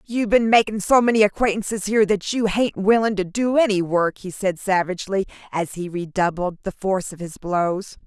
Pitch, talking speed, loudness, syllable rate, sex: 200 Hz, 195 wpm, -21 LUFS, 5.5 syllables/s, female